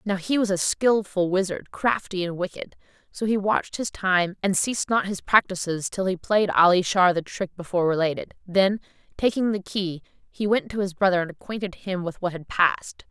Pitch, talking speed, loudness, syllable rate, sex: 190 Hz, 200 wpm, -24 LUFS, 5.2 syllables/s, female